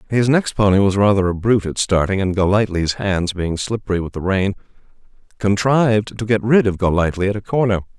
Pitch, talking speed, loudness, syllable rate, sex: 100 Hz, 195 wpm, -18 LUFS, 5.8 syllables/s, male